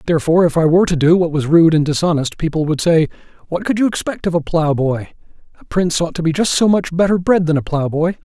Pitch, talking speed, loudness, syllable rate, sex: 165 Hz, 245 wpm, -16 LUFS, 6.4 syllables/s, male